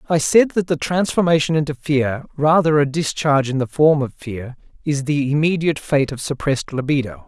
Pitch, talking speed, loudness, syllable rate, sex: 145 Hz, 180 wpm, -18 LUFS, 5.3 syllables/s, male